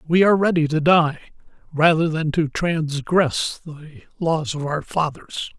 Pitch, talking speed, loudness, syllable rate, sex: 160 Hz, 150 wpm, -20 LUFS, 4.2 syllables/s, male